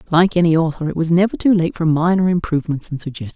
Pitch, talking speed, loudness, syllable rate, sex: 170 Hz, 235 wpm, -17 LUFS, 7.1 syllables/s, female